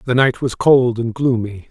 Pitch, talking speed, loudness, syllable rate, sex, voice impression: 120 Hz, 210 wpm, -16 LUFS, 4.5 syllables/s, male, very masculine, old, tensed, slightly powerful, slightly dark, slightly soft, muffled, slightly fluent, raspy, cool, intellectual, refreshing, very sincere, calm, very mature, friendly, reassuring, very unique, slightly elegant, very wild, sweet, lively, slightly strict, intense, slightly modest